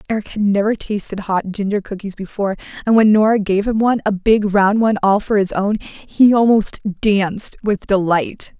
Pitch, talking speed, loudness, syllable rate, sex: 205 Hz, 190 wpm, -17 LUFS, 5.0 syllables/s, female